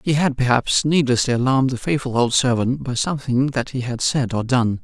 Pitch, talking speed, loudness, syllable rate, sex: 130 Hz, 210 wpm, -19 LUFS, 5.5 syllables/s, male